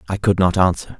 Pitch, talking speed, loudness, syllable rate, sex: 95 Hz, 240 wpm, -17 LUFS, 6.2 syllables/s, male